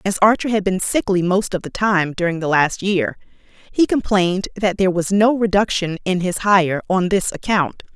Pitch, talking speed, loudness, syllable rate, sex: 190 Hz, 195 wpm, -18 LUFS, 5.0 syllables/s, female